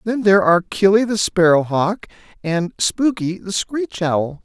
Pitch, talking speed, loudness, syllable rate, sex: 190 Hz, 160 wpm, -17 LUFS, 4.4 syllables/s, male